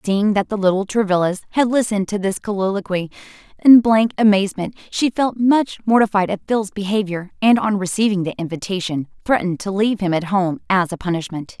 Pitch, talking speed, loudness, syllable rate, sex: 200 Hz, 175 wpm, -18 LUFS, 5.7 syllables/s, female